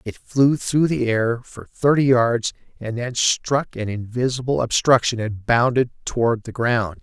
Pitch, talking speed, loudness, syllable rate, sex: 120 Hz, 160 wpm, -20 LUFS, 4.2 syllables/s, male